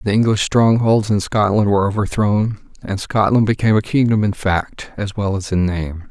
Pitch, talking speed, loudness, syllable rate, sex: 105 Hz, 185 wpm, -17 LUFS, 5.1 syllables/s, male